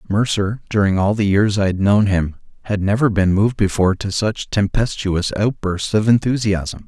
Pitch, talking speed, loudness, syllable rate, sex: 100 Hz, 175 wpm, -18 LUFS, 5.0 syllables/s, male